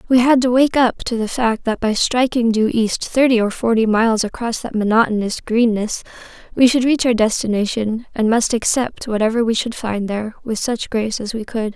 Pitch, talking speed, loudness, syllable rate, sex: 230 Hz, 205 wpm, -17 LUFS, 5.3 syllables/s, female